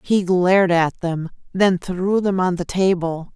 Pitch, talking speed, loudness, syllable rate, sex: 180 Hz, 180 wpm, -19 LUFS, 4.0 syllables/s, female